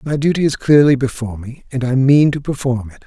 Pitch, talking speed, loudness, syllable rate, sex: 135 Hz, 235 wpm, -16 LUFS, 5.9 syllables/s, male